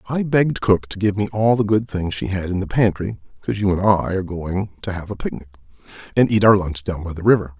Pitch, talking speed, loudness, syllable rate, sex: 95 Hz, 260 wpm, -20 LUFS, 6.2 syllables/s, male